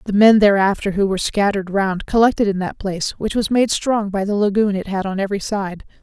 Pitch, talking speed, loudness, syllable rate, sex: 200 Hz, 230 wpm, -18 LUFS, 5.9 syllables/s, female